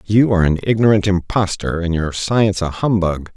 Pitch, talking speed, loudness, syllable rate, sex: 95 Hz, 180 wpm, -17 LUFS, 5.3 syllables/s, male